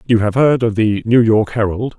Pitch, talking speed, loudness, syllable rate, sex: 115 Hz, 240 wpm, -14 LUFS, 5.1 syllables/s, male